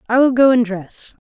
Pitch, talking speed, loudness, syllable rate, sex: 235 Hz, 235 wpm, -14 LUFS, 5.0 syllables/s, female